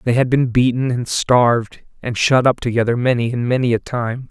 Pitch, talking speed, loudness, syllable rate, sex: 120 Hz, 210 wpm, -17 LUFS, 5.2 syllables/s, male